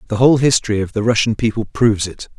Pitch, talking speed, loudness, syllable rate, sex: 110 Hz, 225 wpm, -16 LUFS, 7.1 syllables/s, male